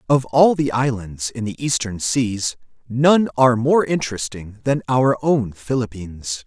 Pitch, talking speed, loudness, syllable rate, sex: 125 Hz, 150 wpm, -19 LUFS, 4.4 syllables/s, male